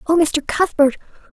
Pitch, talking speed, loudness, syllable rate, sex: 305 Hz, 135 wpm, -17 LUFS, 5.1 syllables/s, female